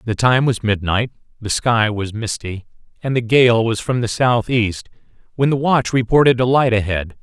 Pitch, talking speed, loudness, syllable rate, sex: 115 Hz, 185 wpm, -17 LUFS, 4.7 syllables/s, male